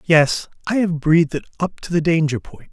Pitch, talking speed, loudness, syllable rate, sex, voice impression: 165 Hz, 220 wpm, -19 LUFS, 5.3 syllables/s, male, masculine, very adult-like, slightly thick, cool, slightly intellectual